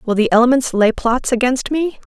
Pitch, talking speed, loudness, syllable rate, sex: 245 Hz, 200 wpm, -16 LUFS, 5.1 syllables/s, female